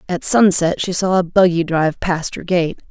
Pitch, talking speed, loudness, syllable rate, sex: 175 Hz, 205 wpm, -16 LUFS, 4.9 syllables/s, female